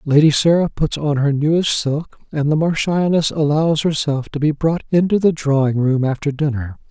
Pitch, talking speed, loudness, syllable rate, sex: 150 Hz, 185 wpm, -17 LUFS, 4.9 syllables/s, male